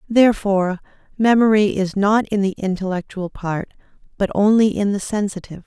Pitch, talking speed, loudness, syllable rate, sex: 200 Hz, 140 wpm, -19 LUFS, 5.4 syllables/s, female